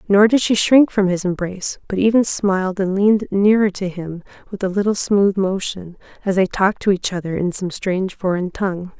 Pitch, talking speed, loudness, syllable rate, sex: 195 Hz, 205 wpm, -18 LUFS, 5.4 syllables/s, female